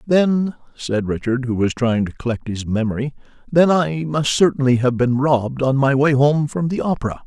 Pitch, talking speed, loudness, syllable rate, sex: 135 Hz, 200 wpm, -18 LUFS, 5.0 syllables/s, male